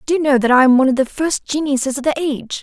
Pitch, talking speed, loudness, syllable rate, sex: 275 Hz, 320 wpm, -16 LUFS, 7.2 syllables/s, female